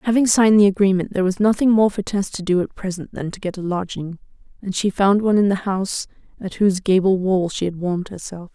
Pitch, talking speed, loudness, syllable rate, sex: 195 Hz, 240 wpm, -19 LUFS, 6.3 syllables/s, female